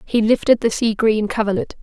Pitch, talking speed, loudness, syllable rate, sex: 215 Hz, 195 wpm, -18 LUFS, 5.4 syllables/s, female